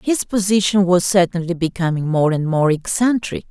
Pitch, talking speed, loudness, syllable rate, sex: 180 Hz, 155 wpm, -17 LUFS, 5.0 syllables/s, female